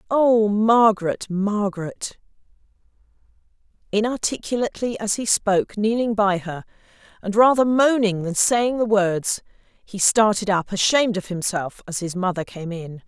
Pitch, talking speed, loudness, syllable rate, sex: 205 Hz, 125 wpm, -20 LUFS, 4.6 syllables/s, female